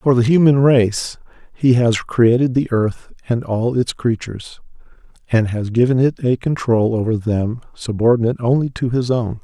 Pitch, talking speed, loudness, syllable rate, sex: 120 Hz, 165 wpm, -17 LUFS, 4.7 syllables/s, male